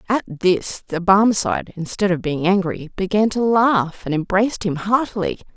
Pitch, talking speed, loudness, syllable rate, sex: 190 Hz, 160 wpm, -19 LUFS, 5.0 syllables/s, female